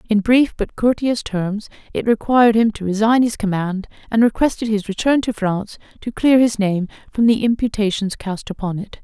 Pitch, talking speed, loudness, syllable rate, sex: 215 Hz, 185 wpm, -18 LUFS, 5.2 syllables/s, female